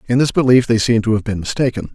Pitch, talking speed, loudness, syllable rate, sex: 115 Hz, 280 wpm, -16 LUFS, 6.9 syllables/s, male